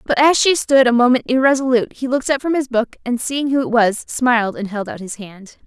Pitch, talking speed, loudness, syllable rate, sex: 250 Hz, 255 wpm, -16 LUFS, 5.8 syllables/s, female